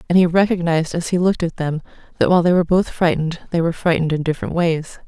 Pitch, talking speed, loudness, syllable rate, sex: 170 Hz, 235 wpm, -18 LUFS, 7.5 syllables/s, female